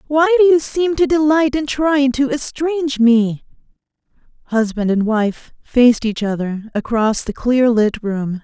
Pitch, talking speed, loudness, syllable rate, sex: 255 Hz, 155 wpm, -16 LUFS, 4.2 syllables/s, female